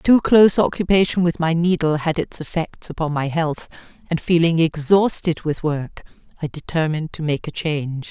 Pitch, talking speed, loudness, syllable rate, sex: 165 Hz, 170 wpm, -19 LUFS, 5.1 syllables/s, female